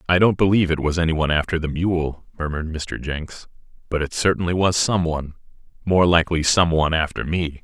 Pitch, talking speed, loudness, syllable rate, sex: 85 Hz, 190 wpm, -20 LUFS, 6.1 syllables/s, male